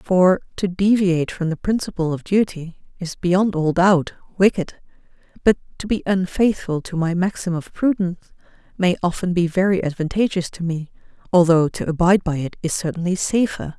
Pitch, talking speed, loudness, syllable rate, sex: 180 Hz, 160 wpm, -20 LUFS, 5.2 syllables/s, female